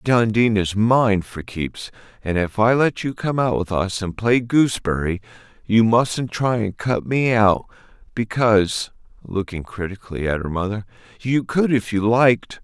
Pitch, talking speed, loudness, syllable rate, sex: 110 Hz, 170 wpm, -20 LUFS, 4.5 syllables/s, male